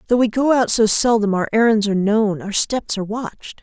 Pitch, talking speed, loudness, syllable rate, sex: 215 Hz, 230 wpm, -17 LUFS, 5.7 syllables/s, female